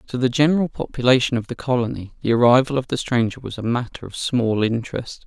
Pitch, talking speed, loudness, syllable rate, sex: 125 Hz, 205 wpm, -20 LUFS, 6.2 syllables/s, male